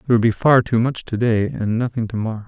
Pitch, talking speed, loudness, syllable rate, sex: 115 Hz, 245 wpm, -19 LUFS, 6.5 syllables/s, male